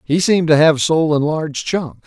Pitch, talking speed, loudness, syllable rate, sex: 155 Hz, 235 wpm, -15 LUFS, 5.2 syllables/s, male